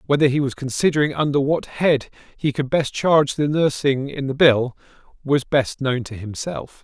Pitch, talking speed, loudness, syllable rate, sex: 140 Hz, 185 wpm, -20 LUFS, 4.9 syllables/s, male